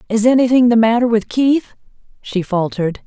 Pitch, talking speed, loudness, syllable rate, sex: 230 Hz, 155 wpm, -15 LUFS, 5.4 syllables/s, female